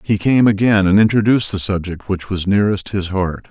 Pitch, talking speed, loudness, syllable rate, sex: 100 Hz, 205 wpm, -16 LUFS, 5.6 syllables/s, male